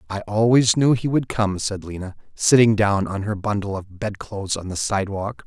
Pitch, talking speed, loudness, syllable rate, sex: 105 Hz, 200 wpm, -21 LUFS, 5.1 syllables/s, male